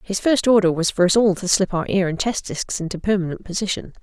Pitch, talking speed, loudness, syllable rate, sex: 190 Hz, 255 wpm, -20 LUFS, 6.0 syllables/s, female